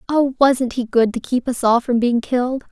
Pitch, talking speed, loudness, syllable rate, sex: 250 Hz, 245 wpm, -18 LUFS, 4.9 syllables/s, female